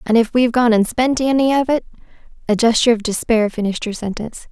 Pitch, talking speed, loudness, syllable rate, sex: 230 Hz, 215 wpm, -17 LUFS, 6.7 syllables/s, female